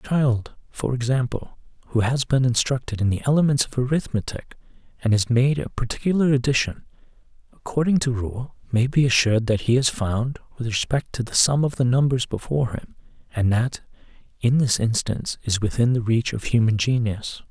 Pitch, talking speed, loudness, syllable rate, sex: 125 Hz, 175 wpm, -22 LUFS, 5.4 syllables/s, male